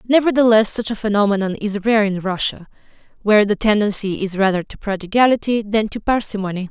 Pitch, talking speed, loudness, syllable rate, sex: 210 Hz, 160 wpm, -18 LUFS, 6.2 syllables/s, female